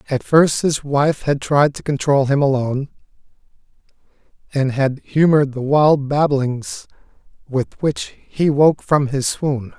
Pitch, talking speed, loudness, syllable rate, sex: 140 Hz, 140 wpm, -17 LUFS, 4.0 syllables/s, male